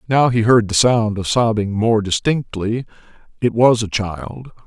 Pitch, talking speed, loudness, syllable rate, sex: 110 Hz, 165 wpm, -17 LUFS, 4.2 syllables/s, male